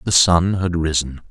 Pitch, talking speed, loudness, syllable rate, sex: 85 Hz, 185 wpm, -17 LUFS, 4.5 syllables/s, male